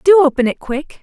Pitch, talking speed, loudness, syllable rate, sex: 305 Hz, 235 wpm, -15 LUFS, 5.6 syllables/s, female